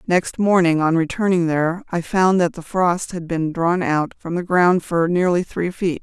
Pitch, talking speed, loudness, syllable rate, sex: 175 Hz, 210 wpm, -19 LUFS, 4.5 syllables/s, female